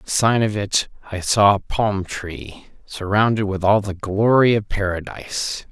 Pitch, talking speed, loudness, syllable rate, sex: 100 Hz, 170 wpm, -19 LUFS, 4.2 syllables/s, male